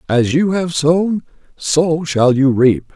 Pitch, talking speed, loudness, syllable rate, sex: 150 Hz, 165 wpm, -15 LUFS, 3.3 syllables/s, male